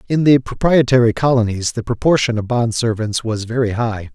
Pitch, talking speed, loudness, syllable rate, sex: 120 Hz, 175 wpm, -16 LUFS, 5.3 syllables/s, male